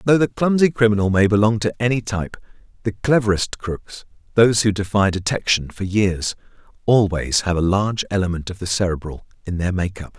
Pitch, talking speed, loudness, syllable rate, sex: 100 Hz, 160 wpm, -19 LUFS, 5.7 syllables/s, male